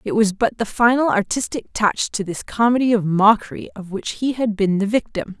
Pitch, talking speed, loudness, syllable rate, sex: 215 Hz, 210 wpm, -19 LUFS, 5.1 syllables/s, female